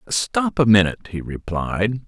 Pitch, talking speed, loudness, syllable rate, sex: 115 Hz, 145 wpm, -20 LUFS, 4.5 syllables/s, male